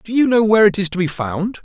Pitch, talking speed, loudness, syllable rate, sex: 200 Hz, 330 wpm, -16 LUFS, 6.7 syllables/s, male